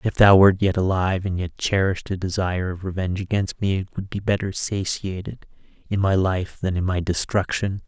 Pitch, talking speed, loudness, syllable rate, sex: 95 Hz, 200 wpm, -22 LUFS, 5.5 syllables/s, male